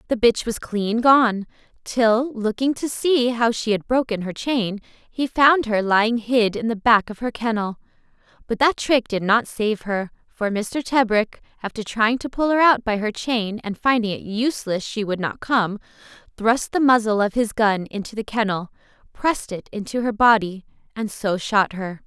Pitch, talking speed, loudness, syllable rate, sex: 225 Hz, 190 wpm, -21 LUFS, 4.6 syllables/s, female